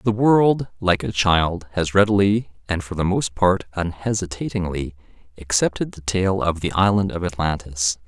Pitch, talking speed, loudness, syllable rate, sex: 90 Hz, 155 wpm, -21 LUFS, 4.5 syllables/s, male